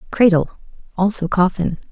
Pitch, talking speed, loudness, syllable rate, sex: 185 Hz, 95 wpm, -17 LUFS, 5.2 syllables/s, female